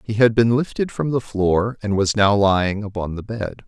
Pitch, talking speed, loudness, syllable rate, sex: 105 Hz, 230 wpm, -19 LUFS, 4.8 syllables/s, male